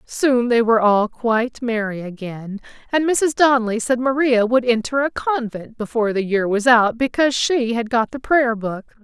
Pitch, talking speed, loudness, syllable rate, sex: 235 Hz, 185 wpm, -18 LUFS, 4.8 syllables/s, female